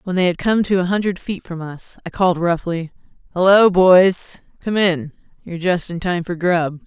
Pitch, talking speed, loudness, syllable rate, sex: 180 Hz, 200 wpm, -17 LUFS, 4.8 syllables/s, female